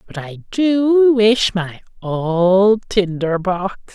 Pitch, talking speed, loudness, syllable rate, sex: 200 Hz, 120 wpm, -16 LUFS, 2.7 syllables/s, male